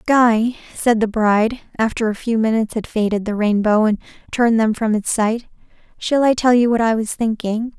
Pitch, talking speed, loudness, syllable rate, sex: 225 Hz, 200 wpm, -18 LUFS, 5.3 syllables/s, female